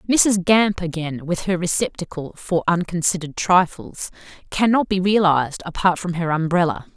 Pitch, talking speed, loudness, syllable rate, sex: 175 Hz, 140 wpm, -20 LUFS, 5.0 syllables/s, female